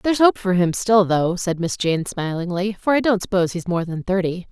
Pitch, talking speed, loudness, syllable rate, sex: 185 Hz, 240 wpm, -20 LUFS, 5.3 syllables/s, female